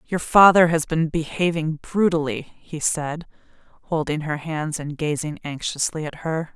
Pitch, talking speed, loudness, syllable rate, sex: 160 Hz, 145 wpm, -22 LUFS, 4.3 syllables/s, female